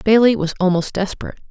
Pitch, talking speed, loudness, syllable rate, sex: 200 Hz, 160 wpm, -17 LUFS, 7.3 syllables/s, female